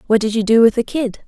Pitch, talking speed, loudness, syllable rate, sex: 225 Hz, 330 wpm, -15 LUFS, 6.4 syllables/s, female